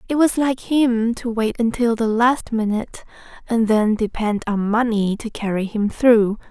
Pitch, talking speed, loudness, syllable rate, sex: 225 Hz, 175 wpm, -19 LUFS, 4.4 syllables/s, female